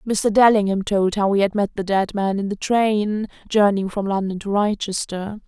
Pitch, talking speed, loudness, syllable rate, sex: 200 Hz, 195 wpm, -20 LUFS, 4.8 syllables/s, female